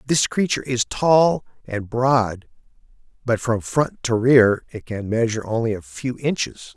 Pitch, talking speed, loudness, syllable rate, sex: 125 Hz, 160 wpm, -21 LUFS, 4.4 syllables/s, male